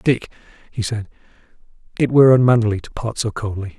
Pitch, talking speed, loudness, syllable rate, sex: 110 Hz, 160 wpm, -18 LUFS, 6.1 syllables/s, male